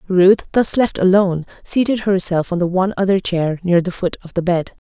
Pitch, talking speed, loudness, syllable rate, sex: 185 Hz, 210 wpm, -17 LUFS, 5.3 syllables/s, female